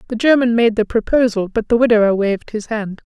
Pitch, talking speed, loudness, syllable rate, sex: 220 Hz, 210 wpm, -16 LUFS, 5.9 syllables/s, female